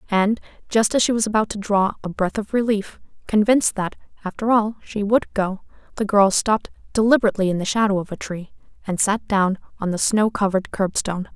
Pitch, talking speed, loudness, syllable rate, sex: 205 Hz, 195 wpm, -21 LUFS, 5.8 syllables/s, female